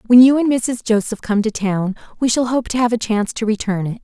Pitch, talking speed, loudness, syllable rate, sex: 225 Hz, 270 wpm, -17 LUFS, 5.8 syllables/s, female